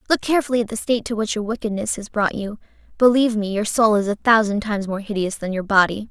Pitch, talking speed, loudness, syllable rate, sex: 215 Hz, 245 wpm, -20 LUFS, 6.7 syllables/s, female